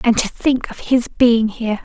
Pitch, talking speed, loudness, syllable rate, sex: 230 Hz, 230 wpm, -17 LUFS, 4.7 syllables/s, female